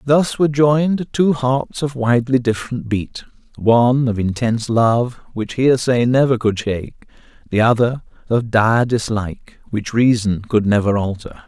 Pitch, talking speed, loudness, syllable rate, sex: 120 Hz, 140 wpm, -17 LUFS, 4.6 syllables/s, male